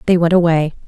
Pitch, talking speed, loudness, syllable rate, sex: 170 Hz, 205 wpm, -14 LUFS, 6.7 syllables/s, female